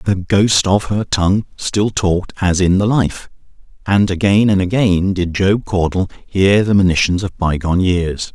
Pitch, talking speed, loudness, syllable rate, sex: 95 Hz, 170 wpm, -15 LUFS, 4.4 syllables/s, male